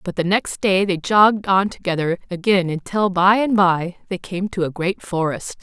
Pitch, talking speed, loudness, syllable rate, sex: 185 Hz, 205 wpm, -19 LUFS, 4.7 syllables/s, female